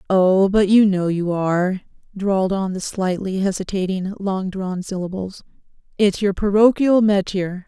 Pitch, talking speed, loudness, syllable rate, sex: 190 Hz, 140 wpm, -19 LUFS, 4.5 syllables/s, female